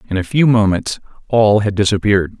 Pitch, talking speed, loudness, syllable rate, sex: 105 Hz, 175 wpm, -14 LUFS, 5.7 syllables/s, male